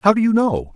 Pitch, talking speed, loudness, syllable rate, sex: 185 Hz, 315 wpm, -17 LUFS, 6.2 syllables/s, male